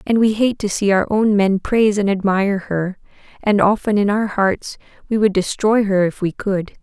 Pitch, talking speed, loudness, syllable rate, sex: 200 Hz, 210 wpm, -17 LUFS, 5.0 syllables/s, female